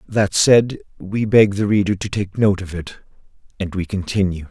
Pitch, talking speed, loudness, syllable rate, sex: 100 Hz, 185 wpm, -18 LUFS, 4.7 syllables/s, male